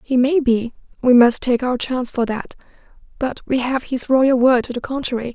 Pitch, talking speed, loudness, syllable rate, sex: 250 Hz, 200 wpm, -18 LUFS, 5.2 syllables/s, female